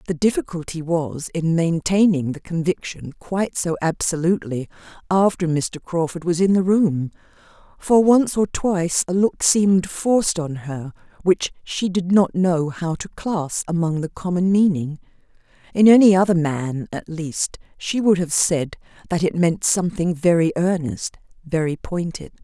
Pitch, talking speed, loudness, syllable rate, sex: 170 Hz, 150 wpm, -20 LUFS, 4.5 syllables/s, female